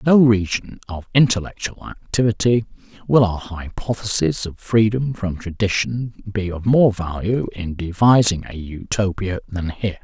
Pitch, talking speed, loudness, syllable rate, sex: 105 Hz, 135 wpm, -20 LUFS, 4.6 syllables/s, male